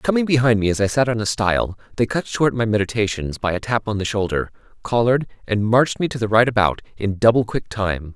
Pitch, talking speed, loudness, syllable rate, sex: 110 Hz, 235 wpm, -20 LUFS, 6.1 syllables/s, male